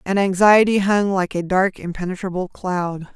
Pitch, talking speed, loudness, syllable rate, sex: 190 Hz, 150 wpm, -19 LUFS, 4.7 syllables/s, female